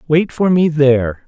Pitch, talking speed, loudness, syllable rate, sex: 145 Hz, 190 wpm, -14 LUFS, 4.5 syllables/s, male